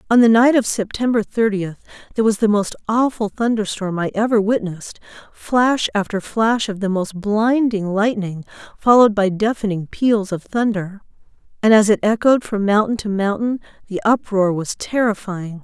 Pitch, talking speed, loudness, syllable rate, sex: 210 Hz, 155 wpm, -18 LUFS, 5.0 syllables/s, female